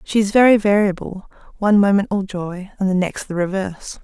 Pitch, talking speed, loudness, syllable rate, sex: 195 Hz, 180 wpm, -18 LUFS, 5.7 syllables/s, female